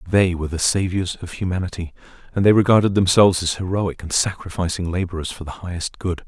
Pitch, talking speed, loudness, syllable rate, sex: 90 Hz, 180 wpm, -20 LUFS, 6.2 syllables/s, male